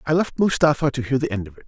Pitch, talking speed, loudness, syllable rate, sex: 135 Hz, 320 wpm, -21 LUFS, 7.1 syllables/s, male